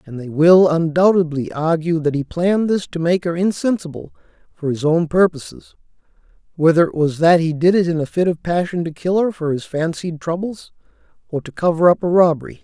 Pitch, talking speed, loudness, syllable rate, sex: 170 Hz, 200 wpm, -17 LUFS, 5.5 syllables/s, male